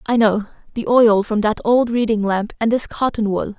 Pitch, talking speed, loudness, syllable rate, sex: 220 Hz, 200 wpm, -18 LUFS, 4.9 syllables/s, female